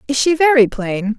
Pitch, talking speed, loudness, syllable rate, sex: 255 Hz, 205 wpm, -15 LUFS, 5.0 syllables/s, female